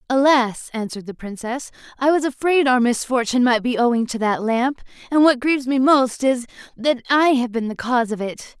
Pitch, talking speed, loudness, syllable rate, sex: 250 Hz, 200 wpm, -19 LUFS, 5.4 syllables/s, female